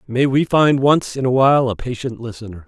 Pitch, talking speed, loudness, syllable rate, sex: 125 Hz, 225 wpm, -16 LUFS, 5.5 syllables/s, male